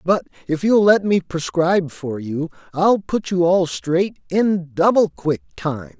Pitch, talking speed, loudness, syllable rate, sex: 170 Hz, 170 wpm, -19 LUFS, 3.9 syllables/s, male